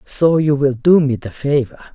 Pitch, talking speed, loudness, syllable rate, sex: 140 Hz, 215 wpm, -15 LUFS, 4.7 syllables/s, female